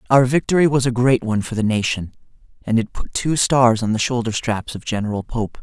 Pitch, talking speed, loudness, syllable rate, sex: 120 Hz, 225 wpm, -19 LUFS, 5.7 syllables/s, male